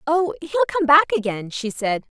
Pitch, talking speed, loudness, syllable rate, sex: 275 Hz, 190 wpm, -20 LUFS, 5.3 syllables/s, female